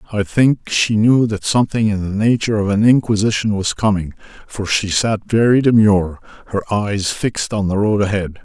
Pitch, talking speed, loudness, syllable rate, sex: 105 Hz, 185 wpm, -16 LUFS, 5.2 syllables/s, male